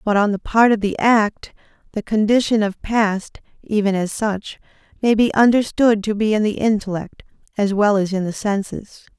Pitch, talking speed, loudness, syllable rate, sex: 210 Hz, 185 wpm, -18 LUFS, 4.7 syllables/s, female